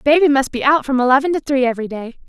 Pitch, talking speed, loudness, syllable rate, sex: 270 Hz, 265 wpm, -16 LUFS, 7.1 syllables/s, female